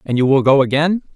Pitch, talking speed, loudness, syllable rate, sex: 145 Hz, 260 wpm, -15 LUFS, 6.3 syllables/s, male